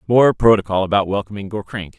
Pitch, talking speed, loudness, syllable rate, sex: 100 Hz, 150 wpm, -17 LUFS, 6.0 syllables/s, male